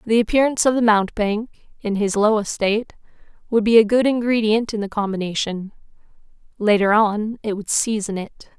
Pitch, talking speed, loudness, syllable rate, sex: 215 Hz, 160 wpm, -19 LUFS, 5.6 syllables/s, female